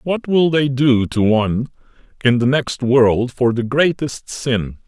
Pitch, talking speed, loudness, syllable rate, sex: 130 Hz, 170 wpm, -17 LUFS, 3.9 syllables/s, male